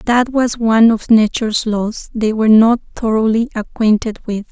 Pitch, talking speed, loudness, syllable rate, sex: 225 Hz, 160 wpm, -14 LUFS, 4.9 syllables/s, female